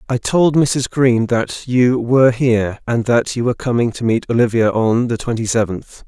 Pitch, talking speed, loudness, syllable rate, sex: 120 Hz, 200 wpm, -16 LUFS, 4.9 syllables/s, male